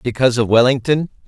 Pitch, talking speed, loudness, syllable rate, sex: 125 Hz, 140 wpm, -15 LUFS, 6.4 syllables/s, male